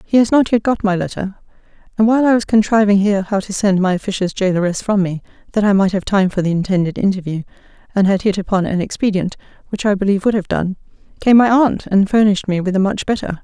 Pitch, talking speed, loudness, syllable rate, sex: 200 Hz, 230 wpm, -16 LUFS, 6.5 syllables/s, female